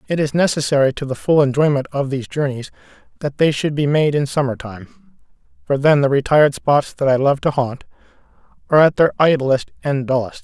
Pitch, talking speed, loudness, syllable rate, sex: 140 Hz, 195 wpm, -17 LUFS, 5.7 syllables/s, male